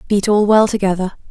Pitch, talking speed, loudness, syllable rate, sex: 200 Hz, 185 wpm, -15 LUFS, 5.8 syllables/s, female